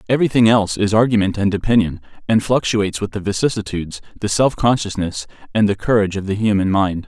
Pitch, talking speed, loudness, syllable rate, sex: 105 Hz, 180 wpm, -18 LUFS, 6.5 syllables/s, male